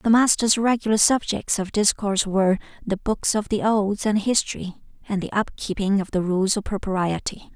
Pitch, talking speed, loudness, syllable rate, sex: 205 Hz, 185 wpm, -22 LUFS, 5.1 syllables/s, female